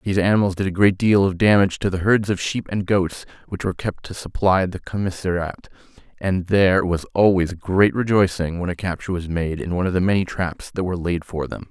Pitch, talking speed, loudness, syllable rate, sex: 95 Hz, 225 wpm, -20 LUFS, 6.0 syllables/s, male